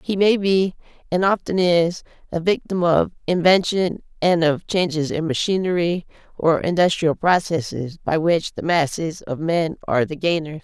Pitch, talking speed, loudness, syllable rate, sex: 170 Hz, 150 wpm, -20 LUFS, 4.6 syllables/s, female